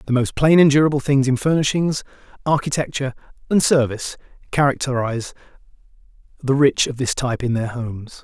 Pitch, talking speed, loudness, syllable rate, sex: 135 Hz, 145 wpm, -19 LUFS, 6.1 syllables/s, male